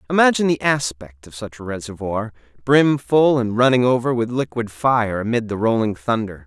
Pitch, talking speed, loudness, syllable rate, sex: 115 Hz, 175 wpm, -19 LUFS, 5.2 syllables/s, male